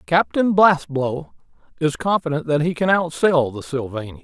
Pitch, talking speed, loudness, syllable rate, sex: 150 Hz, 140 wpm, -19 LUFS, 4.8 syllables/s, male